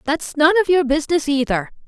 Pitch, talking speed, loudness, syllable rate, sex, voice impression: 295 Hz, 190 wpm, -18 LUFS, 6.0 syllables/s, female, very feminine, slightly young, slightly adult-like, very thin, tensed, slightly powerful, very bright, hard, clear, fluent, slightly raspy, cute, intellectual, very refreshing, sincere, slightly calm, friendly, reassuring, very unique, elegant, slightly wild, sweet, lively, kind, slightly sharp